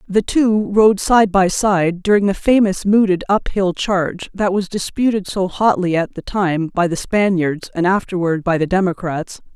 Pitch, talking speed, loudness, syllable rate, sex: 190 Hz, 180 wpm, -17 LUFS, 4.5 syllables/s, female